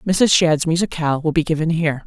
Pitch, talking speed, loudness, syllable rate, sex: 160 Hz, 205 wpm, -18 LUFS, 6.2 syllables/s, female